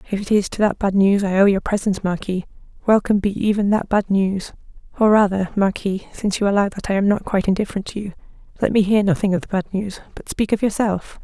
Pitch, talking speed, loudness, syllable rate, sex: 200 Hz, 235 wpm, -19 LUFS, 6.7 syllables/s, female